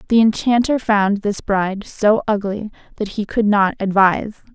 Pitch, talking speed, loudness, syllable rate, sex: 210 Hz, 160 wpm, -18 LUFS, 4.7 syllables/s, female